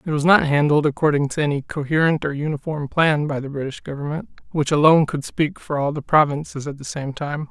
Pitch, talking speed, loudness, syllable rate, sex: 150 Hz, 215 wpm, -20 LUFS, 5.9 syllables/s, male